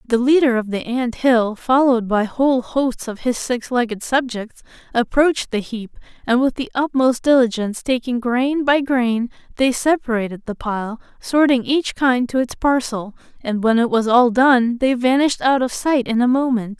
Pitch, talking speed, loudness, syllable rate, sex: 245 Hz, 180 wpm, -18 LUFS, 4.8 syllables/s, female